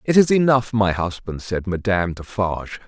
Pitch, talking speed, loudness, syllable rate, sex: 105 Hz, 165 wpm, -20 LUFS, 5.1 syllables/s, male